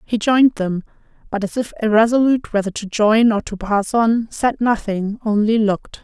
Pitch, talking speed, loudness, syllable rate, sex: 220 Hz, 180 wpm, -18 LUFS, 5.1 syllables/s, female